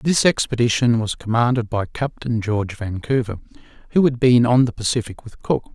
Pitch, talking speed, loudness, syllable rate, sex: 120 Hz, 165 wpm, -19 LUFS, 5.3 syllables/s, male